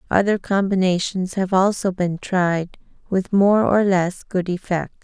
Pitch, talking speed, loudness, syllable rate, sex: 190 Hz, 145 wpm, -20 LUFS, 4.1 syllables/s, female